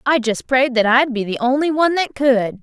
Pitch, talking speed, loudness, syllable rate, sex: 255 Hz, 250 wpm, -17 LUFS, 5.3 syllables/s, female